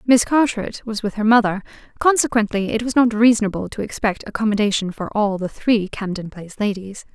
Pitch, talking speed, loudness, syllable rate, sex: 215 Hz, 175 wpm, -19 LUFS, 5.8 syllables/s, female